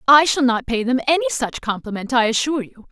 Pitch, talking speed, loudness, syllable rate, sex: 255 Hz, 225 wpm, -19 LUFS, 6.2 syllables/s, female